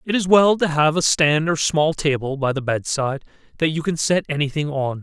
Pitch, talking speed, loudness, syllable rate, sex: 150 Hz, 250 wpm, -19 LUFS, 5.1 syllables/s, male